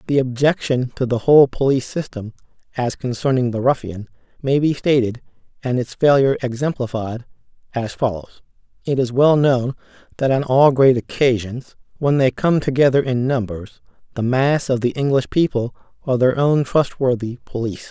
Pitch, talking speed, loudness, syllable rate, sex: 130 Hz, 155 wpm, -18 LUFS, 5.2 syllables/s, male